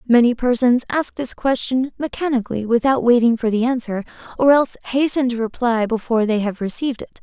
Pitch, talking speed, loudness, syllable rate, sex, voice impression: 245 Hz, 175 wpm, -19 LUFS, 5.8 syllables/s, female, feminine, slightly young, tensed, bright, clear, fluent, cute, friendly, elegant, slightly sweet, slightly sharp